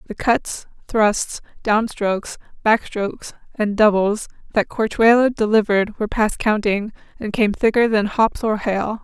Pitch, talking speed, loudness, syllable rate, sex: 215 Hz, 145 wpm, -19 LUFS, 4.4 syllables/s, female